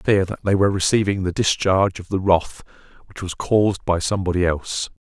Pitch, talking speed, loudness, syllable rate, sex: 95 Hz, 215 wpm, -20 LUFS, 6.3 syllables/s, male